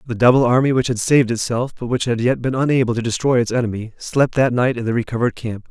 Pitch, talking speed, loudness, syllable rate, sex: 120 Hz, 255 wpm, -18 LUFS, 6.6 syllables/s, male